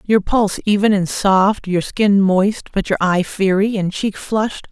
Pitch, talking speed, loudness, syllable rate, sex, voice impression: 200 Hz, 190 wpm, -17 LUFS, 4.2 syllables/s, female, feminine, adult-like, tensed, slightly bright, fluent, intellectual, slightly friendly, unique, slightly sharp